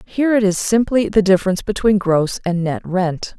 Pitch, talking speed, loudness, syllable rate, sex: 195 Hz, 195 wpm, -17 LUFS, 5.3 syllables/s, female